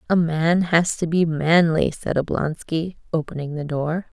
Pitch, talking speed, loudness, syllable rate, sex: 165 Hz, 160 wpm, -21 LUFS, 4.2 syllables/s, female